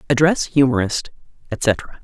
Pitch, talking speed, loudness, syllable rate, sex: 135 Hz, 90 wpm, -18 LUFS, 4.1 syllables/s, female